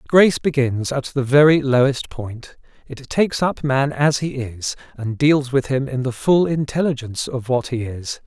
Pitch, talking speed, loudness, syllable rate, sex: 135 Hz, 190 wpm, -19 LUFS, 4.6 syllables/s, male